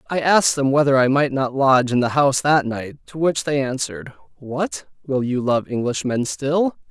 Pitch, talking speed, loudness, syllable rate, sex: 135 Hz, 210 wpm, -19 LUFS, 5.1 syllables/s, male